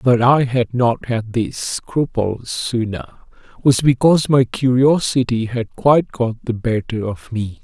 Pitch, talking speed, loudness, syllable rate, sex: 125 Hz, 150 wpm, -18 LUFS, 4.1 syllables/s, male